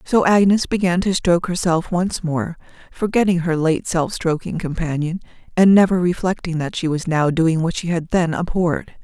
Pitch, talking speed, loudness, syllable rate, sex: 175 Hz, 180 wpm, -19 LUFS, 5.0 syllables/s, female